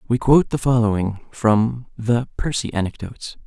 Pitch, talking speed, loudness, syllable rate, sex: 115 Hz, 140 wpm, -20 LUFS, 5.1 syllables/s, male